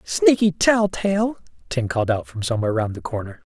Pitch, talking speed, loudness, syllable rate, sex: 145 Hz, 190 wpm, -21 LUFS, 5.5 syllables/s, male